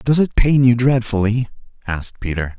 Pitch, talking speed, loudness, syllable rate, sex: 115 Hz, 160 wpm, -17 LUFS, 5.2 syllables/s, male